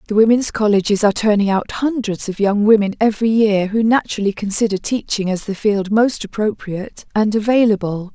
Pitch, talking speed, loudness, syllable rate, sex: 210 Hz, 170 wpm, -17 LUFS, 5.6 syllables/s, female